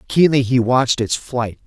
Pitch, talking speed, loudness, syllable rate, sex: 125 Hz, 180 wpm, -17 LUFS, 4.8 syllables/s, male